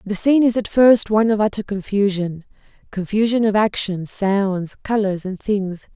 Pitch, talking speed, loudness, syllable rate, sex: 205 Hz, 150 wpm, -19 LUFS, 4.9 syllables/s, female